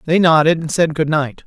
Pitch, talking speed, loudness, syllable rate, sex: 155 Hz, 245 wpm, -15 LUFS, 5.4 syllables/s, male